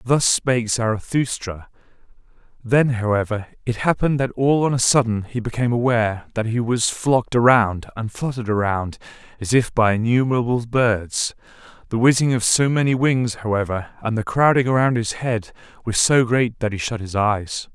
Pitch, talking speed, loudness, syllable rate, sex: 115 Hz, 160 wpm, -20 LUFS, 5.1 syllables/s, male